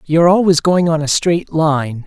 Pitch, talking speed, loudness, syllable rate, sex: 160 Hz, 205 wpm, -14 LUFS, 4.7 syllables/s, male